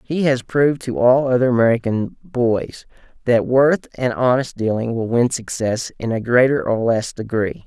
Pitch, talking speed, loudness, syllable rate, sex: 120 Hz, 170 wpm, -18 LUFS, 4.5 syllables/s, male